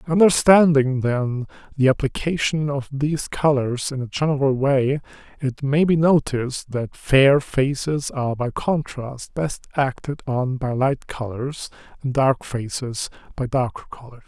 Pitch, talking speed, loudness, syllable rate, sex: 135 Hz, 140 wpm, -21 LUFS, 4.2 syllables/s, male